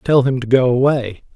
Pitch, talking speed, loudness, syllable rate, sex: 130 Hz, 220 wpm, -16 LUFS, 4.9 syllables/s, male